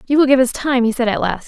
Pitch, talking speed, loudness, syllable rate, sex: 245 Hz, 365 wpm, -16 LUFS, 6.6 syllables/s, female